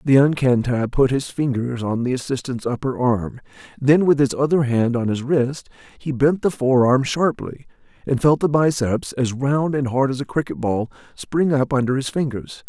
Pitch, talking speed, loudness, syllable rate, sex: 135 Hz, 195 wpm, -20 LUFS, 4.7 syllables/s, male